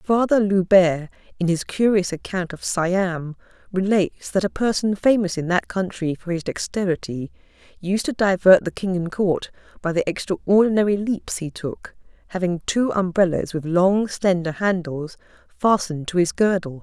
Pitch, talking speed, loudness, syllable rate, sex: 185 Hz, 155 wpm, -21 LUFS, 4.7 syllables/s, female